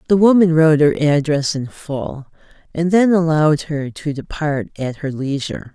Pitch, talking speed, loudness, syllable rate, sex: 155 Hz, 165 wpm, -17 LUFS, 4.7 syllables/s, female